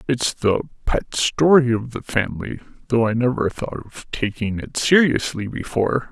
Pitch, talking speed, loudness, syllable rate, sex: 120 Hz, 155 wpm, -20 LUFS, 4.7 syllables/s, male